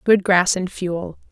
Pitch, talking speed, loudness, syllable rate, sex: 185 Hz, 185 wpm, -19 LUFS, 3.6 syllables/s, female